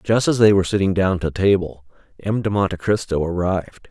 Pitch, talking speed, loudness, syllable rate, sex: 95 Hz, 200 wpm, -19 LUFS, 5.7 syllables/s, male